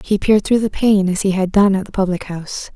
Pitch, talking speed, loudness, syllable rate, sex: 195 Hz, 285 wpm, -16 LUFS, 6.0 syllables/s, female